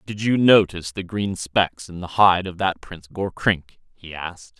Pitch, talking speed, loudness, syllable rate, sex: 95 Hz, 195 wpm, -21 LUFS, 4.7 syllables/s, male